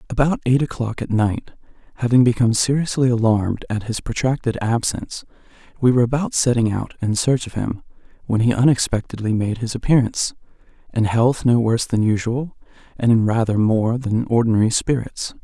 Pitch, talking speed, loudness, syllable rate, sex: 115 Hz, 160 wpm, -19 LUFS, 5.6 syllables/s, male